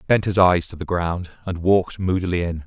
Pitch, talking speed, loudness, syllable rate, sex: 90 Hz, 250 wpm, -21 LUFS, 5.8 syllables/s, male